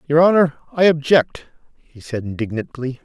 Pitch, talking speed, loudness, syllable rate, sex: 145 Hz, 140 wpm, -18 LUFS, 4.9 syllables/s, male